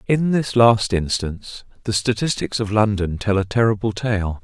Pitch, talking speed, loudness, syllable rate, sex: 105 Hz, 160 wpm, -19 LUFS, 4.7 syllables/s, male